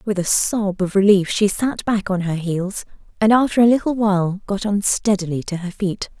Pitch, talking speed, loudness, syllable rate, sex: 200 Hz, 205 wpm, -19 LUFS, 5.0 syllables/s, female